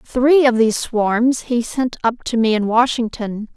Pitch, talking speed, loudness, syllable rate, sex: 235 Hz, 185 wpm, -17 LUFS, 4.3 syllables/s, female